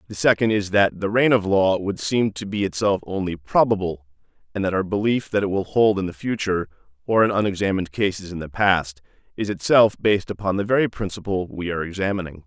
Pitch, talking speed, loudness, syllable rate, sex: 100 Hz, 205 wpm, -21 LUFS, 6.0 syllables/s, male